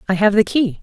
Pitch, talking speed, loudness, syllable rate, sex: 210 Hz, 290 wpm, -16 LUFS, 6.2 syllables/s, female